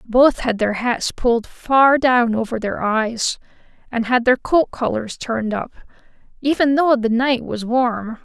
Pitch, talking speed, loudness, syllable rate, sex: 240 Hz, 165 wpm, -18 LUFS, 4.1 syllables/s, female